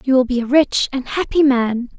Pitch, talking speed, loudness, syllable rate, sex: 260 Hz, 240 wpm, -17 LUFS, 5.0 syllables/s, female